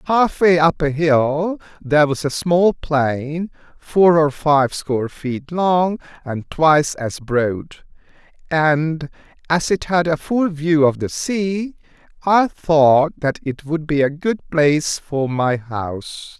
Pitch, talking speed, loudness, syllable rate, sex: 155 Hz, 155 wpm, -18 LUFS, 3.4 syllables/s, male